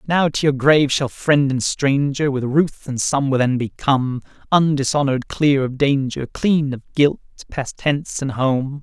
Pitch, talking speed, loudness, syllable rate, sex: 140 Hz, 175 wpm, -19 LUFS, 4.6 syllables/s, male